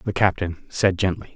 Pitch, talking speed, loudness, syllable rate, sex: 95 Hz, 180 wpm, -22 LUFS, 4.7 syllables/s, male